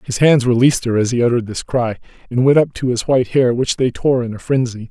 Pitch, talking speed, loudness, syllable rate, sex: 125 Hz, 270 wpm, -16 LUFS, 6.3 syllables/s, male